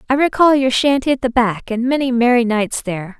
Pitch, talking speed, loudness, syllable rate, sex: 245 Hz, 225 wpm, -16 LUFS, 5.7 syllables/s, female